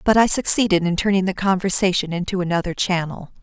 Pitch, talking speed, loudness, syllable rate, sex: 185 Hz, 175 wpm, -19 LUFS, 6.2 syllables/s, female